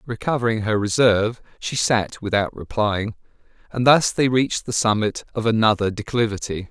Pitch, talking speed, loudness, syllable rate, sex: 110 Hz, 145 wpm, -20 LUFS, 5.3 syllables/s, male